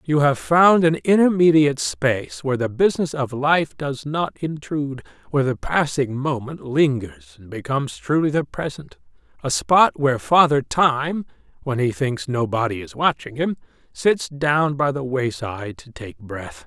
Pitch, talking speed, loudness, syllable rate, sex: 140 Hz, 160 wpm, -20 LUFS, 4.6 syllables/s, male